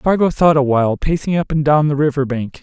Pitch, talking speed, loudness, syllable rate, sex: 145 Hz, 230 wpm, -16 LUFS, 5.8 syllables/s, male